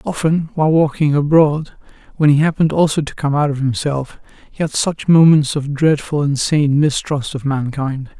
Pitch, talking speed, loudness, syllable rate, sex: 145 Hz, 175 wpm, -16 LUFS, 4.9 syllables/s, male